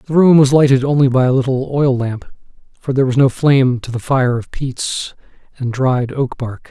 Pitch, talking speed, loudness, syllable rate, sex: 130 Hz, 215 wpm, -15 LUFS, 5.1 syllables/s, male